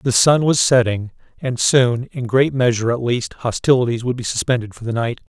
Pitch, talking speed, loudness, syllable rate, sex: 125 Hz, 200 wpm, -18 LUFS, 5.2 syllables/s, male